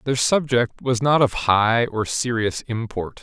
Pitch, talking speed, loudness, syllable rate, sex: 120 Hz, 170 wpm, -20 LUFS, 3.9 syllables/s, male